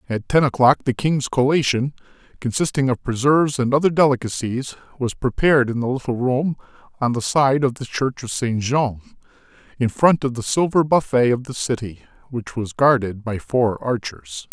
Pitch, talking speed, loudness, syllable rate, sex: 125 Hz, 175 wpm, -20 LUFS, 5.0 syllables/s, male